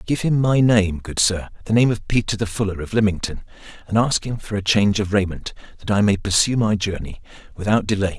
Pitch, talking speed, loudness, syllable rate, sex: 100 Hz, 220 wpm, -20 LUFS, 5.9 syllables/s, male